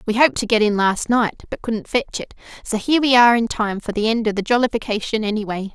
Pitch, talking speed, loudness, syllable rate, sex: 220 Hz, 250 wpm, -19 LUFS, 6.3 syllables/s, female